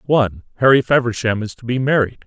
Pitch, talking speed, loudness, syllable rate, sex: 120 Hz, 185 wpm, -17 LUFS, 6.4 syllables/s, male